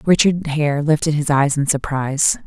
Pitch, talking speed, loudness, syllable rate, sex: 150 Hz, 170 wpm, -17 LUFS, 4.8 syllables/s, female